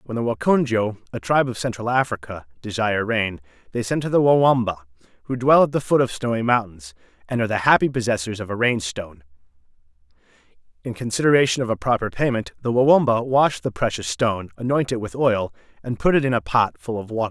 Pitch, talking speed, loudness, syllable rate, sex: 115 Hz, 200 wpm, -21 LUFS, 6.2 syllables/s, male